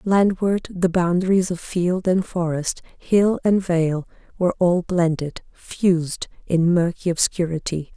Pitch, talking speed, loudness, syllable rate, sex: 175 Hz, 130 wpm, -21 LUFS, 4.0 syllables/s, female